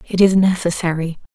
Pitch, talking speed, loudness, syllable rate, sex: 175 Hz, 135 wpm, -17 LUFS, 5.6 syllables/s, female